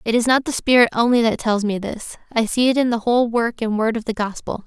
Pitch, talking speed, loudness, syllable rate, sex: 230 Hz, 270 wpm, -19 LUFS, 5.9 syllables/s, female